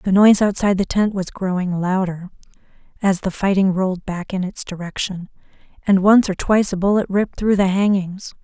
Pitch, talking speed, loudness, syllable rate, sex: 190 Hz, 185 wpm, -18 LUFS, 5.6 syllables/s, female